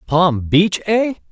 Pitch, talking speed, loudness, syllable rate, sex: 180 Hz, 135 wpm, -16 LUFS, 3.1 syllables/s, male